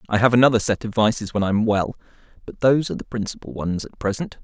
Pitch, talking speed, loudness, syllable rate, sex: 110 Hz, 230 wpm, -21 LUFS, 6.7 syllables/s, male